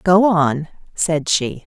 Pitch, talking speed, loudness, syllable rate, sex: 165 Hz, 135 wpm, -18 LUFS, 3.1 syllables/s, female